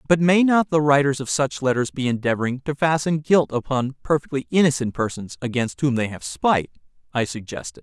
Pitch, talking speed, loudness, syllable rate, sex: 135 Hz, 185 wpm, -21 LUFS, 5.7 syllables/s, male